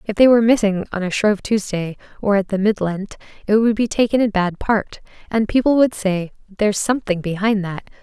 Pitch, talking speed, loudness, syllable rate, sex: 205 Hz, 210 wpm, -18 LUFS, 5.6 syllables/s, female